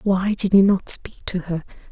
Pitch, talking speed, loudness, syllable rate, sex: 190 Hz, 220 wpm, -20 LUFS, 4.8 syllables/s, female